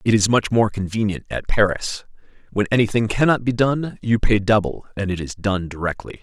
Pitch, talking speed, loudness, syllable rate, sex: 105 Hz, 185 wpm, -20 LUFS, 5.3 syllables/s, male